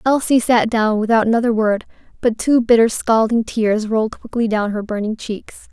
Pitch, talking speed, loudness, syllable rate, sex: 225 Hz, 180 wpm, -17 LUFS, 4.9 syllables/s, female